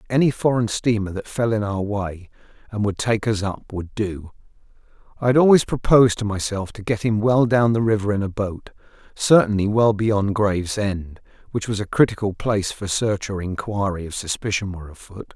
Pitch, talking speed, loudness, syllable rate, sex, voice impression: 105 Hz, 190 wpm, -21 LUFS, 5.3 syllables/s, male, very masculine, slightly old, very thick, tensed, very powerful, slightly dark, soft, slightly muffled, fluent, raspy, cool, intellectual, slightly refreshing, sincere, calm, very mature, friendly, reassuring, very unique, slightly elegant, very wild, sweet, lively, kind, slightly intense